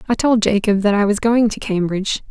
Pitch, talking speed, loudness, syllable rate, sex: 210 Hz, 235 wpm, -17 LUFS, 5.8 syllables/s, female